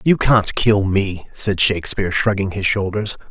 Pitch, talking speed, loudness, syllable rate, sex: 100 Hz, 165 wpm, -18 LUFS, 4.6 syllables/s, male